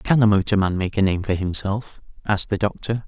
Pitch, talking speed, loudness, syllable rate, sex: 100 Hz, 215 wpm, -21 LUFS, 5.7 syllables/s, male